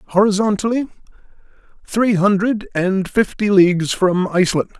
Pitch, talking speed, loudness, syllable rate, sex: 195 Hz, 100 wpm, -17 LUFS, 4.6 syllables/s, male